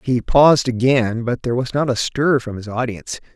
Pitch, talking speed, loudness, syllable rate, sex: 125 Hz, 215 wpm, -18 LUFS, 5.5 syllables/s, male